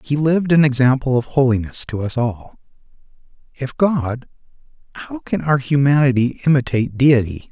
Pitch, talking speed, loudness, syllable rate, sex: 135 Hz, 135 wpm, -17 LUFS, 5.2 syllables/s, male